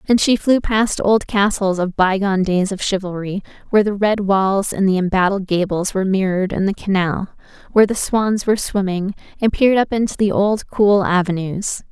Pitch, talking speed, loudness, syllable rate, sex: 195 Hz, 190 wpm, -17 LUFS, 5.2 syllables/s, female